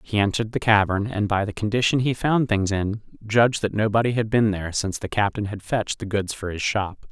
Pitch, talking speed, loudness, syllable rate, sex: 105 Hz, 235 wpm, -23 LUFS, 6.0 syllables/s, male